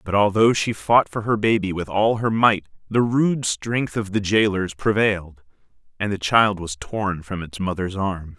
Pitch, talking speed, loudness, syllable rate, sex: 100 Hz, 195 wpm, -21 LUFS, 4.4 syllables/s, male